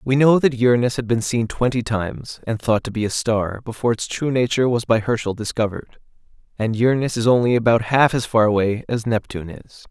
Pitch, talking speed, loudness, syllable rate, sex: 115 Hz, 210 wpm, -19 LUFS, 5.9 syllables/s, male